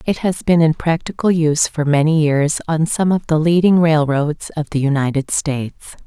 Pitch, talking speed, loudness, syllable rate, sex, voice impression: 155 Hz, 190 wpm, -16 LUFS, 5.0 syllables/s, female, feminine, adult-like, tensed, powerful, clear, fluent, intellectual, calm, reassuring, elegant, slightly lively